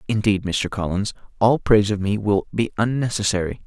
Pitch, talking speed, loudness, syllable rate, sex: 105 Hz, 165 wpm, -21 LUFS, 5.5 syllables/s, male